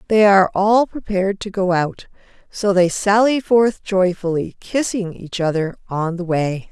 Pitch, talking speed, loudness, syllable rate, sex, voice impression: 190 Hz, 160 wpm, -18 LUFS, 4.4 syllables/s, female, very feminine, adult-like, elegant